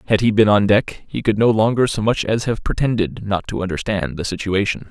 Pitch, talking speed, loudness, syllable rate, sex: 105 Hz, 235 wpm, -18 LUFS, 5.6 syllables/s, male